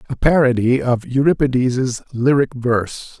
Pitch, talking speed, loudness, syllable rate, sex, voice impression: 130 Hz, 115 wpm, -17 LUFS, 4.5 syllables/s, male, masculine, middle-aged, tensed, powerful, clear, fluent, cool, mature, friendly, wild, lively, slightly strict